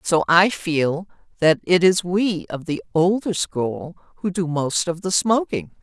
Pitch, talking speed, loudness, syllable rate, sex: 175 Hz, 175 wpm, -20 LUFS, 3.9 syllables/s, female